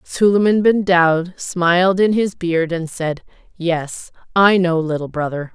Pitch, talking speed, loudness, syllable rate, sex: 175 Hz, 150 wpm, -17 LUFS, 3.9 syllables/s, female